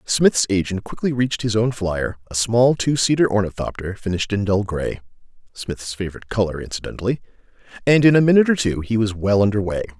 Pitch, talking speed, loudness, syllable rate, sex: 105 Hz, 170 wpm, -20 LUFS, 6.1 syllables/s, male